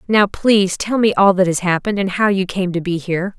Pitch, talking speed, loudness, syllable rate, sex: 190 Hz, 265 wpm, -16 LUFS, 5.9 syllables/s, female